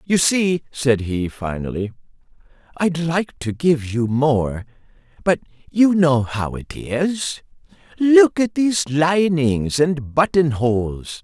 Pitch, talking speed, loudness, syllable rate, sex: 150 Hz, 125 wpm, -19 LUFS, 3.4 syllables/s, male